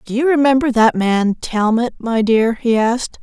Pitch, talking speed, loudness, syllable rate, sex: 235 Hz, 185 wpm, -15 LUFS, 4.7 syllables/s, female